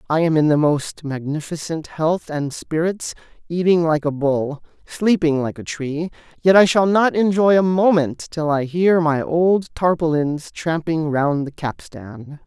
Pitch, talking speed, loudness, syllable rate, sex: 160 Hz, 165 wpm, -19 LUFS, 4.1 syllables/s, male